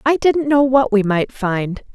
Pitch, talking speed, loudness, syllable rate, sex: 240 Hz, 215 wpm, -16 LUFS, 4.0 syllables/s, female